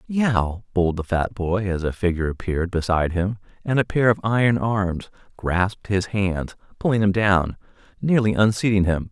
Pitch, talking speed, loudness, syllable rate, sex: 100 Hz, 170 wpm, -22 LUFS, 5.1 syllables/s, male